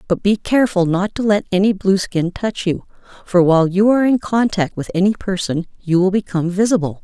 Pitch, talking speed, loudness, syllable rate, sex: 190 Hz, 195 wpm, -17 LUFS, 5.7 syllables/s, female